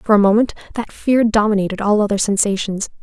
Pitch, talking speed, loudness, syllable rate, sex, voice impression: 210 Hz, 180 wpm, -16 LUFS, 6.0 syllables/s, female, feminine, slightly young, slightly fluent, slightly cute, refreshing, slightly intense